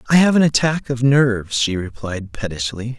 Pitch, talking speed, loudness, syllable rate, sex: 120 Hz, 180 wpm, -18 LUFS, 5.1 syllables/s, male